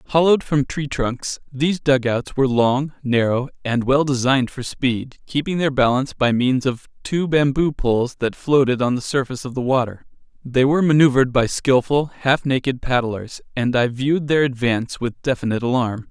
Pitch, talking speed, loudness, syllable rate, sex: 130 Hz, 175 wpm, -19 LUFS, 5.3 syllables/s, male